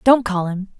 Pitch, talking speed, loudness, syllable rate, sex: 205 Hz, 225 wpm, -19 LUFS, 4.6 syllables/s, female